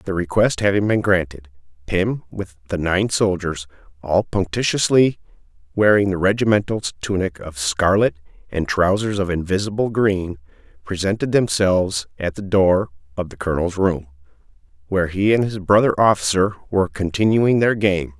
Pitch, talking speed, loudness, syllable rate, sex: 95 Hz, 140 wpm, -19 LUFS, 5.0 syllables/s, male